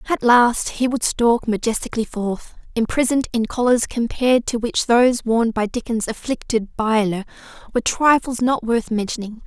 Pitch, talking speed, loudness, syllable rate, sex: 235 Hz, 150 wpm, -19 LUFS, 5.1 syllables/s, female